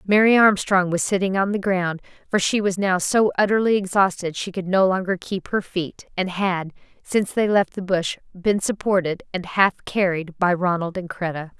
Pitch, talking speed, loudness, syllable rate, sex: 185 Hz, 190 wpm, -21 LUFS, 4.9 syllables/s, female